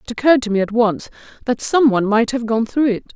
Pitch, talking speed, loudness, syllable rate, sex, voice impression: 235 Hz, 265 wpm, -17 LUFS, 6.5 syllables/s, female, feminine, adult-like, slightly tensed, slightly powerful, bright, soft, slightly muffled, intellectual, calm, friendly, reassuring, lively, kind